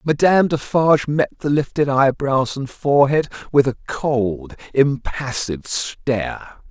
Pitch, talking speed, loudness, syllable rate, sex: 135 Hz, 115 wpm, -19 LUFS, 4.2 syllables/s, male